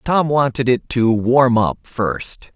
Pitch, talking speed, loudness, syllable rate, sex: 120 Hz, 140 wpm, -17 LUFS, 3.3 syllables/s, male